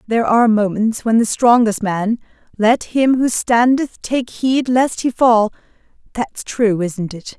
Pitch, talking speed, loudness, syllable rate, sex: 230 Hz, 155 wpm, -16 LUFS, 4.0 syllables/s, female